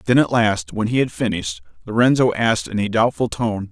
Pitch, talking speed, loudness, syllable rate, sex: 110 Hz, 210 wpm, -19 LUFS, 5.7 syllables/s, male